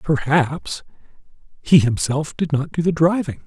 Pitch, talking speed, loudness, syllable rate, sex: 150 Hz, 140 wpm, -19 LUFS, 4.3 syllables/s, male